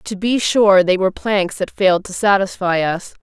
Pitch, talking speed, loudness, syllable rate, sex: 195 Hz, 205 wpm, -16 LUFS, 4.9 syllables/s, female